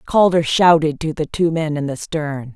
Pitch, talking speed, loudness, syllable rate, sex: 155 Hz, 210 wpm, -17 LUFS, 4.6 syllables/s, female